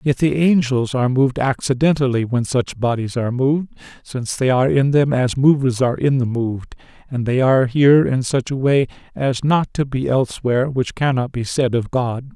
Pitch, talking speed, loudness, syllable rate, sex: 130 Hz, 200 wpm, -18 LUFS, 5.5 syllables/s, male